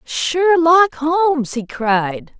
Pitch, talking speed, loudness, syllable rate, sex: 295 Hz, 100 wpm, -16 LUFS, 2.6 syllables/s, female